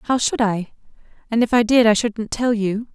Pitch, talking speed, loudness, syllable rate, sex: 225 Hz, 225 wpm, -19 LUFS, 4.8 syllables/s, female